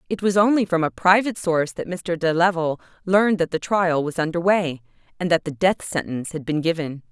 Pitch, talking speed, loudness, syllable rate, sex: 175 Hz, 220 wpm, -21 LUFS, 5.8 syllables/s, female